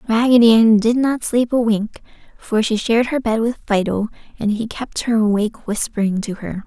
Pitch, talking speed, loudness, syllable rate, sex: 225 Hz, 200 wpm, -17 LUFS, 5.1 syllables/s, female